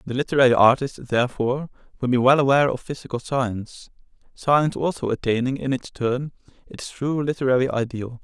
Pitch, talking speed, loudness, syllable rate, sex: 130 Hz, 155 wpm, -22 LUFS, 5.8 syllables/s, male